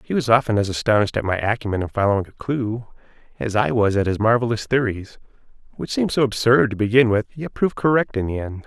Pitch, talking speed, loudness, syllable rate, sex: 115 Hz, 220 wpm, -20 LUFS, 6.5 syllables/s, male